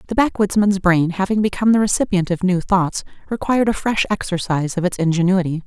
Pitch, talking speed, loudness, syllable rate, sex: 190 Hz, 180 wpm, -18 LUFS, 6.2 syllables/s, female